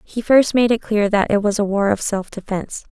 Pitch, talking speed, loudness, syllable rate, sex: 215 Hz, 265 wpm, -18 LUFS, 5.4 syllables/s, female